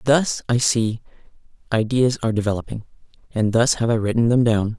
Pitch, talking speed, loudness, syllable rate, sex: 115 Hz, 165 wpm, -20 LUFS, 5.5 syllables/s, male